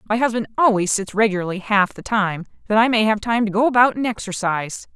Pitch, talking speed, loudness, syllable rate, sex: 215 Hz, 220 wpm, -19 LUFS, 6.2 syllables/s, female